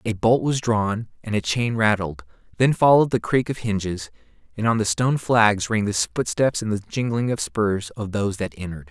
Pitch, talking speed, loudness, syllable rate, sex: 110 Hz, 210 wpm, -22 LUFS, 5.2 syllables/s, male